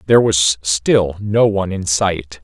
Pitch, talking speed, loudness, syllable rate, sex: 95 Hz, 170 wpm, -16 LUFS, 4.1 syllables/s, male